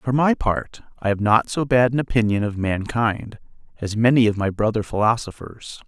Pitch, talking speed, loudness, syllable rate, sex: 115 Hz, 185 wpm, -20 LUFS, 4.9 syllables/s, male